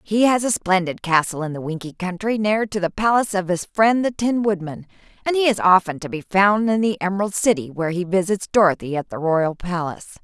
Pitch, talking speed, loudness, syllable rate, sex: 190 Hz, 225 wpm, -20 LUFS, 5.8 syllables/s, female